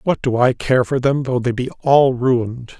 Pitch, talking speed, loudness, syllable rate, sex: 125 Hz, 235 wpm, -17 LUFS, 4.7 syllables/s, male